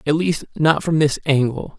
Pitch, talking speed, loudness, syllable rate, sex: 150 Hz, 200 wpm, -19 LUFS, 4.5 syllables/s, male